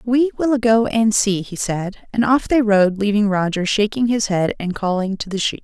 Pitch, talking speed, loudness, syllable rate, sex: 210 Hz, 225 wpm, -18 LUFS, 4.7 syllables/s, female